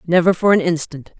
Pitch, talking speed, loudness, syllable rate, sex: 170 Hz, 200 wpm, -16 LUFS, 5.8 syllables/s, female